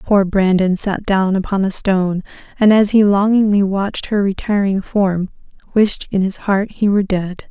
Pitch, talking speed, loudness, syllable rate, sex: 195 Hz, 175 wpm, -16 LUFS, 4.7 syllables/s, female